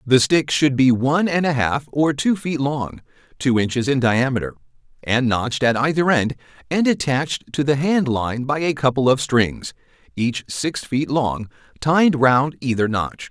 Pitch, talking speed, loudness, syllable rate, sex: 135 Hz, 180 wpm, -19 LUFS, 4.5 syllables/s, male